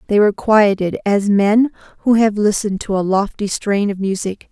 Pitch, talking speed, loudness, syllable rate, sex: 205 Hz, 185 wpm, -16 LUFS, 5.2 syllables/s, female